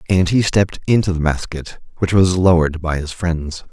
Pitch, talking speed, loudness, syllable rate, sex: 85 Hz, 195 wpm, -17 LUFS, 5.2 syllables/s, male